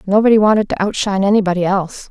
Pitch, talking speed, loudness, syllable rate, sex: 200 Hz, 170 wpm, -15 LUFS, 7.6 syllables/s, female